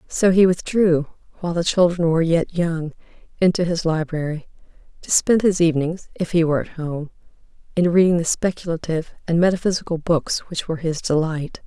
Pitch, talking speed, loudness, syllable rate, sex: 170 Hz, 165 wpm, -20 LUFS, 5.5 syllables/s, female